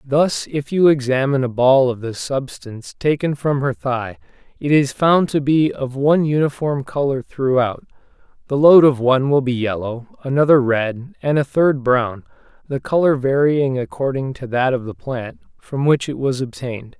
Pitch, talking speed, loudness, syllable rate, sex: 135 Hz, 175 wpm, -18 LUFS, 4.8 syllables/s, male